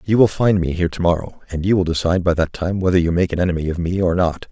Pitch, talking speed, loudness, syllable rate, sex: 90 Hz, 290 wpm, -18 LUFS, 6.9 syllables/s, male